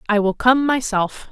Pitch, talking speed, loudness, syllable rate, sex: 230 Hz, 185 wpm, -18 LUFS, 4.4 syllables/s, female